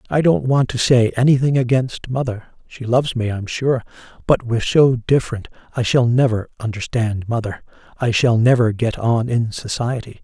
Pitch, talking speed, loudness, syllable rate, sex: 120 Hz, 170 wpm, -18 LUFS, 5.1 syllables/s, male